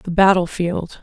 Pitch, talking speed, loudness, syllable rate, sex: 180 Hz, 175 wpm, -17 LUFS, 4.0 syllables/s, female